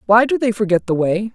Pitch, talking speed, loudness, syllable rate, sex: 200 Hz, 270 wpm, -17 LUFS, 5.9 syllables/s, male